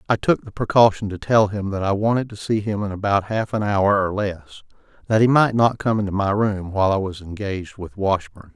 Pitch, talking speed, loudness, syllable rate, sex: 100 Hz, 240 wpm, -20 LUFS, 5.6 syllables/s, male